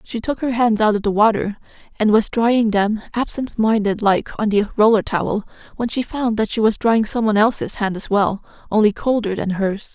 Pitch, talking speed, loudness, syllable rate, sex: 215 Hz, 210 wpm, -18 LUFS, 5.2 syllables/s, female